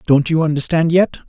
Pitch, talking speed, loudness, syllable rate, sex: 160 Hz, 190 wpm, -15 LUFS, 5.7 syllables/s, male